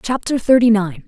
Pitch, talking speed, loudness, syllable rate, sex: 220 Hz, 165 wpm, -15 LUFS, 5.2 syllables/s, female